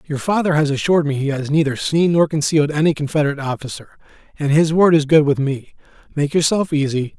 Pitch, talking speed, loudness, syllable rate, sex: 150 Hz, 200 wpm, -17 LUFS, 6.3 syllables/s, male